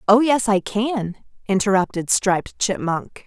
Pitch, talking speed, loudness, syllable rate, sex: 205 Hz, 130 wpm, -20 LUFS, 4.2 syllables/s, female